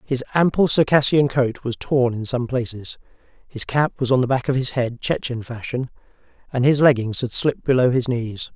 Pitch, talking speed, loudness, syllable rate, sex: 125 Hz, 195 wpm, -20 LUFS, 5.2 syllables/s, male